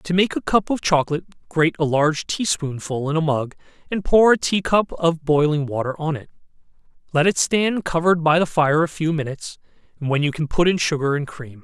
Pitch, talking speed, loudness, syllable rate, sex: 160 Hz, 215 wpm, -20 LUFS, 5.5 syllables/s, male